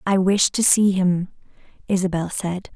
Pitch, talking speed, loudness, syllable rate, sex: 185 Hz, 155 wpm, -20 LUFS, 4.4 syllables/s, female